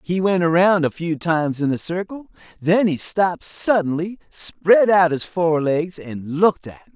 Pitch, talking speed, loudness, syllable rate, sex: 170 Hz, 180 wpm, -19 LUFS, 4.7 syllables/s, male